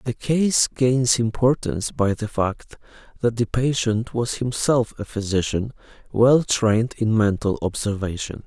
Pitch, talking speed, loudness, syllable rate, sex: 115 Hz, 135 wpm, -21 LUFS, 4.2 syllables/s, male